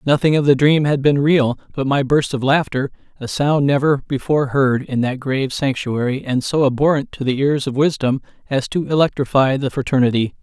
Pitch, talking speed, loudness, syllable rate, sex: 135 Hz, 195 wpm, -18 LUFS, 5.3 syllables/s, male